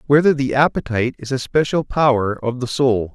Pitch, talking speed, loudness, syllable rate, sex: 130 Hz, 190 wpm, -18 LUFS, 5.4 syllables/s, male